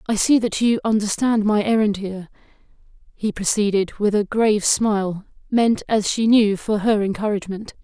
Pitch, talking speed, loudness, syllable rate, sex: 210 Hz, 160 wpm, -19 LUFS, 5.1 syllables/s, female